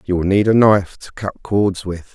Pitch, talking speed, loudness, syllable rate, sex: 100 Hz, 250 wpm, -16 LUFS, 5.0 syllables/s, male